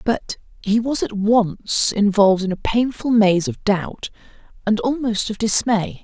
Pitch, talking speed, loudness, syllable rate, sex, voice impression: 215 Hz, 160 wpm, -19 LUFS, 4.1 syllables/s, female, feminine, adult-like, weak, muffled, halting, raspy, intellectual, calm, slightly reassuring, unique, elegant, modest